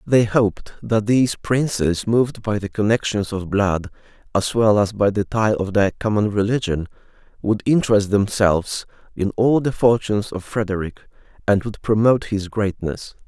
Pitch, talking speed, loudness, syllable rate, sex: 105 Hz, 160 wpm, -20 LUFS, 4.9 syllables/s, male